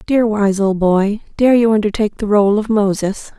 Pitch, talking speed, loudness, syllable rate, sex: 210 Hz, 195 wpm, -15 LUFS, 4.9 syllables/s, female